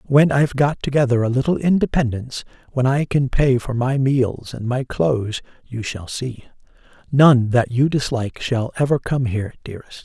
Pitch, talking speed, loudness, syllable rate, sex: 130 Hz, 175 wpm, -19 LUFS, 5.1 syllables/s, male